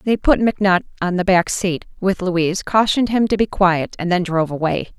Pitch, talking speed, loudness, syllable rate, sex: 185 Hz, 215 wpm, -18 LUFS, 5.7 syllables/s, female